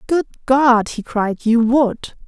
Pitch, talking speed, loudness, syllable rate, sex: 245 Hz, 160 wpm, -16 LUFS, 3.2 syllables/s, female